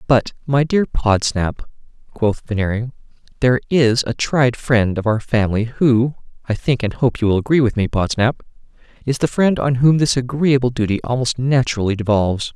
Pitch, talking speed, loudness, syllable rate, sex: 120 Hz, 170 wpm, -18 LUFS, 5.2 syllables/s, male